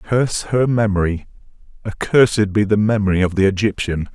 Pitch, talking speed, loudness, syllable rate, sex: 105 Hz, 130 wpm, -17 LUFS, 5.7 syllables/s, male